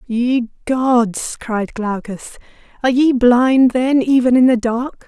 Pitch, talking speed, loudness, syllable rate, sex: 245 Hz, 140 wpm, -15 LUFS, 3.5 syllables/s, female